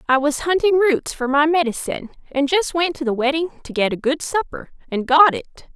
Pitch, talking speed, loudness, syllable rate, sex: 295 Hz, 220 wpm, -19 LUFS, 5.6 syllables/s, female